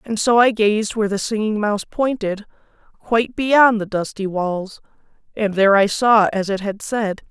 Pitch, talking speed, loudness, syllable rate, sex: 210 Hz, 180 wpm, -18 LUFS, 4.8 syllables/s, female